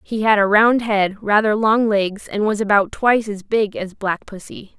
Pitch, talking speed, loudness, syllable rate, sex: 210 Hz, 215 wpm, -17 LUFS, 4.5 syllables/s, female